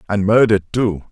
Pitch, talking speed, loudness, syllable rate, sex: 105 Hz, 160 wpm, -16 LUFS, 6.2 syllables/s, male